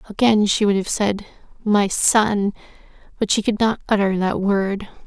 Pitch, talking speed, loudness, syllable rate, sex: 205 Hz, 165 wpm, -19 LUFS, 4.4 syllables/s, female